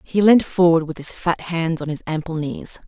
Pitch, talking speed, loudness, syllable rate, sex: 165 Hz, 230 wpm, -19 LUFS, 4.7 syllables/s, female